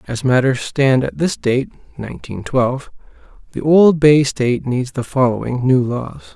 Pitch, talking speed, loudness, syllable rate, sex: 130 Hz, 160 wpm, -16 LUFS, 4.2 syllables/s, male